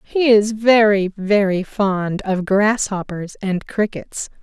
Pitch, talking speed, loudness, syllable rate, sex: 200 Hz, 120 wpm, -18 LUFS, 3.4 syllables/s, female